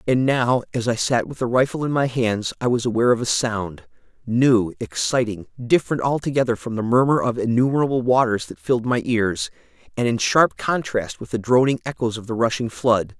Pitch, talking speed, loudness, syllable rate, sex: 120 Hz, 190 wpm, -21 LUFS, 5.4 syllables/s, male